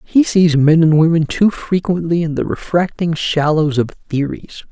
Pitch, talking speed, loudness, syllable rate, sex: 165 Hz, 165 wpm, -15 LUFS, 4.6 syllables/s, male